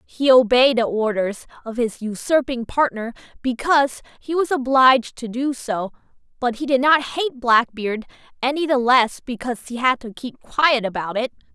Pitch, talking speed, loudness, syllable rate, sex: 250 Hz, 165 wpm, -20 LUFS, 4.8 syllables/s, female